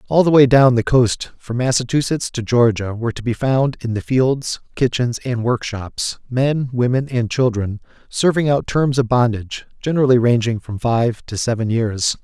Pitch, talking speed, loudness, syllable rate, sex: 120 Hz, 175 wpm, -18 LUFS, 4.7 syllables/s, male